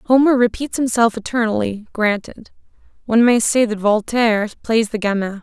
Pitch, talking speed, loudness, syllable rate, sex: 225 Hz, 145 wpm, -17 LUFS, 5.3 syllables/s, female